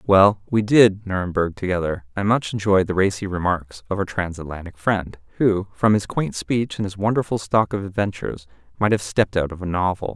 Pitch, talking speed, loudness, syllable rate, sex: 95 Hz, 195 wpm, -21 LUFS, 5.3 syllables/s, male